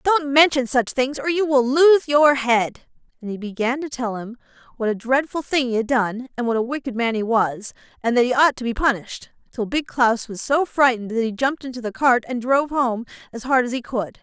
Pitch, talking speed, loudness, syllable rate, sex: 250 Hz, 240 wpm, -20 LUFS, 5.4 syllables/s, female